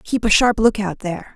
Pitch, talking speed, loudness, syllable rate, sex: 210 Hz, 220 wpm, -17 LUFS, 5.6 syllables/s, female